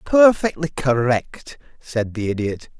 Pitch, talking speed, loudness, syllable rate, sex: 135 Hz, 105 wpm, -20 LUFS, 3.8 syllables/s, male